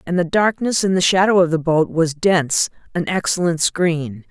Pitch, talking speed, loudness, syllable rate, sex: 170 Hz, 195 wpm, -17 LUFS, 4.9 syllables/s, female